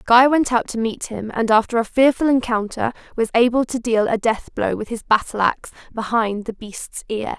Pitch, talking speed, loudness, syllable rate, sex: 230 Hz, 205 wpm, -19 LUFS, 5.0 syllables/s, female